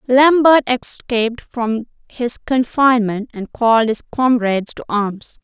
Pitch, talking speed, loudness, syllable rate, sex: 235 Hz, 120 wpm, -16 LUFS, 4.5 syllables/s, female